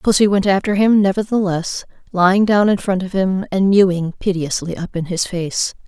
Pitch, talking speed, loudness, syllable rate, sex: 190 Hz, 185 wpm, -17 LUFS, 5.0 syllables/s, female